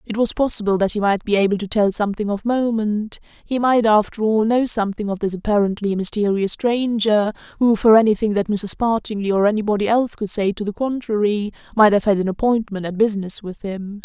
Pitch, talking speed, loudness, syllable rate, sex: 210 Hz, 195 wpm, -19 LUFS, 5.8 syllables/s, female